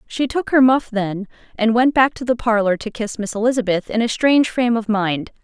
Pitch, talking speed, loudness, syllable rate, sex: 230 Hz, 230 wpm, -18 LUFS, 5.5 syllables/s, female